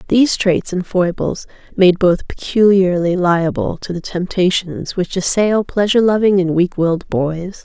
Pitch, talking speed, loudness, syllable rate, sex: 185 Hz, 150 wpm, -16 LUFS, 4.5 syllables/s, female